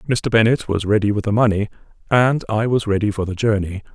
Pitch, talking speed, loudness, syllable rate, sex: 110 Hz, 215 wpm, -18 LUFS, 5.9 syllables/s, male